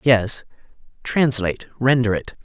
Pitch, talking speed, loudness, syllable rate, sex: 120 Hz, 100 wpm, -20 LUFS, 4.4 syllables/s, male